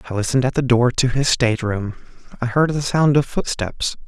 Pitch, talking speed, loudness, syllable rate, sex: 125 Hz, 205 wpm, -19 LUFS, 5.8 syllables/s, male